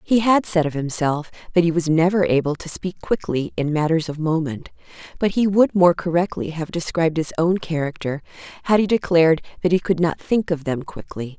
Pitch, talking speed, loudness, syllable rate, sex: 165 Hz, 200 wpm, -20 LUFS, 5.4 syllables/s, female